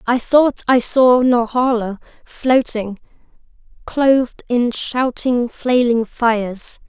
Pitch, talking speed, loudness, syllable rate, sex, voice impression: 240 Hz, 95 wpm, -16 LUFS, 3.3 syllables/s, female, masculine, young, tensed, powerful, bright, clear, slightly cute, refreshing, friendly, reassuring, lively, intense